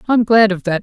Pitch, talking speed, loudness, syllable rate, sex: 205 Hz, 290 wpm, -13 LUFS, 5.6 syllables/s, female